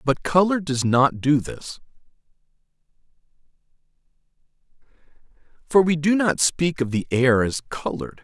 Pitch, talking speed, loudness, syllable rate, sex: 150 Hz, 115 wpm, -21 LUFS, 4.5 syllables/s, male